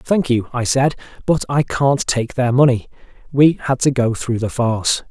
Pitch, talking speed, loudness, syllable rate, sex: 130 Hz, 200 wpm, -17 LUFS, 4.5 syllables/s, male